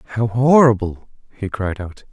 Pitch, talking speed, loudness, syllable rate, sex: 110 Hz, 140 wpm, -17 LUFS, 4.8 syllables/s, male